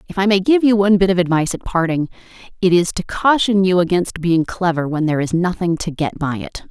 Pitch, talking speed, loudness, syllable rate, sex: 180 Hz, 240 wpm, -17 LUFS, 6.0 syllables/s, female